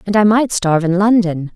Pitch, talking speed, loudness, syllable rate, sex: 195 Hz, 230 wpm, -14 LUFS, 5.6 syllables/s, female